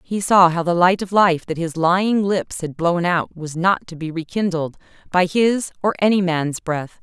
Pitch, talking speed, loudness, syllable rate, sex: 175 Hz, 215 wpm, -19 LUFS, 4.5 syllables/s, female